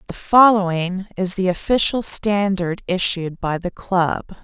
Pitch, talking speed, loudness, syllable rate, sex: 190 Hz, 135 wpm, -18 LUFS, 4.0 syllables/s, female